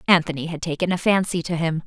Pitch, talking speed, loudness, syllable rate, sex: 170 Hz, 225 wpm, -22 LUFS, 6.5 syllables/s, female